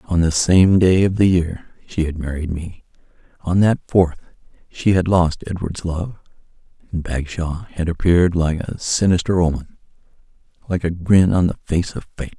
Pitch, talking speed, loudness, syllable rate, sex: 85 Hz, 165 wpm, -18 LUFS, 4.9 syllables/s, male